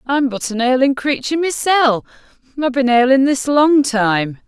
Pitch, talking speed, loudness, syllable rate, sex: 260 Hz, 150 wpm, -15 LUFS, 4.2 syllables/s, female